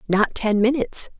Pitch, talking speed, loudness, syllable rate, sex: 225 Hz, 150 wpm, -21 LUFS, 5.2 syllables/s, female